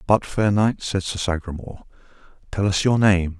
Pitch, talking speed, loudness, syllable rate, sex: 95 Hz, 175 wpm, -21 LUFS, 5.1 syllables/s, male